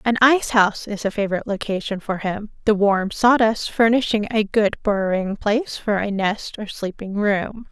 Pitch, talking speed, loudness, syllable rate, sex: 210 Hz, 180 wpm, -20 LUFS, 5.0 syllables/s, female